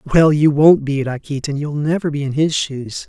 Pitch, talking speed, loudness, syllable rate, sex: 145 Hz, 215 wpm, -17 LUFS, 4.7 syllables/s, male